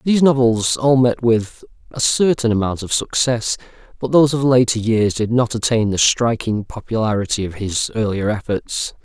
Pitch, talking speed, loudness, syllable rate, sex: 115 Hz, 165 wpm, -17 LUFS, 4.8 syllables/s, male